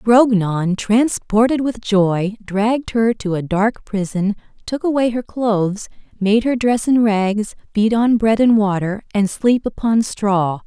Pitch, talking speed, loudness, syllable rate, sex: 215 Hz, 155 wpm, -17 LUFS, 3.8 syllables/s, female